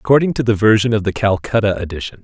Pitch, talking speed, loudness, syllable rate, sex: 105 Hz, 215 wpm, -16 LUFS, 6.9 syllables/s, male